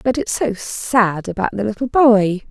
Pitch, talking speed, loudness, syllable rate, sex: 220 Hz, 190 wpm, -17 LUFS, 4.3 syllables/s, female